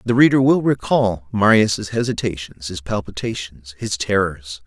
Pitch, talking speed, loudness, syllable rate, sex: 105 Hz, 130 wpm, -19 LUFS, 4.5 syllables/s, male